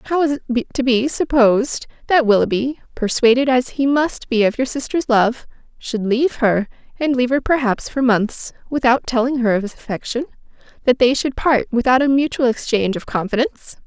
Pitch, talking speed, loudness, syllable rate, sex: 250 Hz, 175 wpm, -18 LUFS, 5.5 syllables/s, female